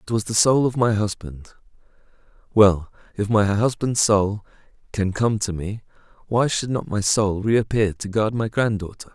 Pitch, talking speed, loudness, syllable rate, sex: 105 Hz, 165 wpm, -21 LUFS, 4.5 syllables/s, male